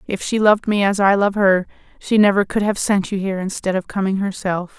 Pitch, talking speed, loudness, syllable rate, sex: 195 Hz, 240 wpm, -18 LUFS, 5.8 syllables/s, female